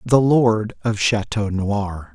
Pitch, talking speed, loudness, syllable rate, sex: 110 Hz, 140 wpm, -19 LUFS, 3.1 syllables/s, male